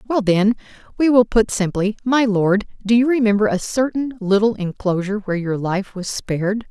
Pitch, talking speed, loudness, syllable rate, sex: 210 Hz, 180 wpm, -19 LUFS, 5.1 syllables/s, female